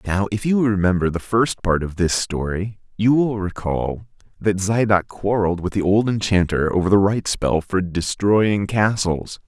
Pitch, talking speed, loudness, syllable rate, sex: 100 Hz, 170 wpm, -20 LUFS, 4.5 syllables/s, male